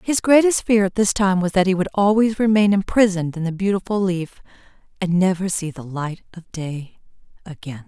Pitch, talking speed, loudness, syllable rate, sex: 190 Hz, 190 wpm, -19 LUFS, 5.3 syllables/s, female